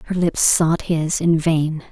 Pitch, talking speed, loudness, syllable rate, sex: 165 Hz, 190 wpm, -18 LUFS, 3.8 syllables/s, female